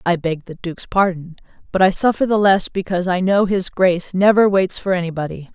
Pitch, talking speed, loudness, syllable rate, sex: 185 Hz, 205 wpm, -17 LUFS, 5.7 syllables/s, female